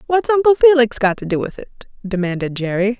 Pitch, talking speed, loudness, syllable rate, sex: 235 Hz, 200 wpm, -16 LUFS, 6.1 syllables/s, female